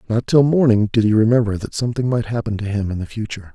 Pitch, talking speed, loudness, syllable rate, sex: 110 Hz, 255 wpm, -18 LUFS, 6.9 syllables/s, male